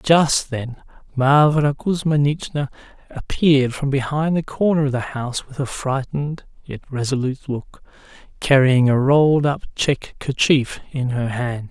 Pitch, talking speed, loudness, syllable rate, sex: 140 Hz, 140 wpm, -19 LUFS, 4.5 syllables/s, male